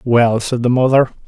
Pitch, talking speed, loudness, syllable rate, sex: 120 Hz, 190 wpm, -14 LUFS, 4.8 syllables/s, male